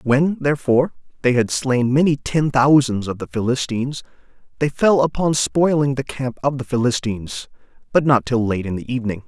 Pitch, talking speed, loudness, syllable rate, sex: 130 Hz, 175 wpm, -19 LUFS, 5.4 syllables/s, male